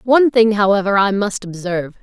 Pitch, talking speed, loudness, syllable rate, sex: 205 Hz, 180 wpm, -16 LUFS, 5.8 syllables/s, female